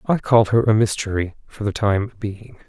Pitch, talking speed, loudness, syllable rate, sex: 105 Hz, 200 wpm, -20 LUFS, 4.7 syllables/s, male